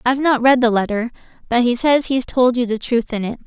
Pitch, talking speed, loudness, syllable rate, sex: 245 Hz, 260 wpm, -17 LUFS, 5.8 syllables/s, female